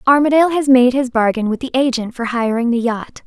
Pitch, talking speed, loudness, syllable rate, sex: 250 Hz, 220 wpm, -15 LUFS, 5.8 syllables/s, female